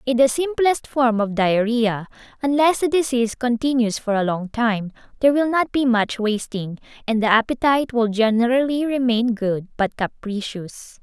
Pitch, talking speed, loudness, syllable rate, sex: 240 Hz, 160 wpm, -20 LUFS, 4.7 syllables/s, female